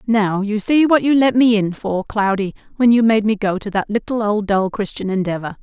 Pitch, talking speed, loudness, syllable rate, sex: 215 Hz, 235 wpm, -17 LUFS, 5.1 syllables/s, female